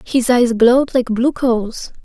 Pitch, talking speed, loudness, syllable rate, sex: 245 Hz, 175 wpm, -15 LUFS, 4.3 syllables/s, female